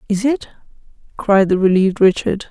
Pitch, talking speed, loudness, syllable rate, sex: 205 Hz, 145 wpm, -15 LUFS, 5.5 syllables/s, female